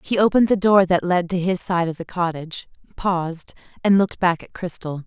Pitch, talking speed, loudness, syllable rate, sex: 180 Hz, 190 wpm, -20 LUFS, 5.7 syllables/s, female